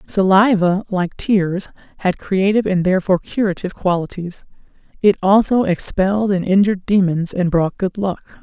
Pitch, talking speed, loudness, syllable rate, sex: 190 Hz, 135 wpm, -17 LUFS, 5.2 syllables/s, female